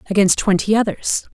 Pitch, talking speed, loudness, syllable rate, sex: 200 Hz, 135 wpm, -17 LUFS, 5.6 syllables/s, female